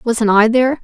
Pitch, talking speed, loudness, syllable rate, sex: 235 Hz, 215 wpm, -13 LUFS, 5.3 syllables/s, female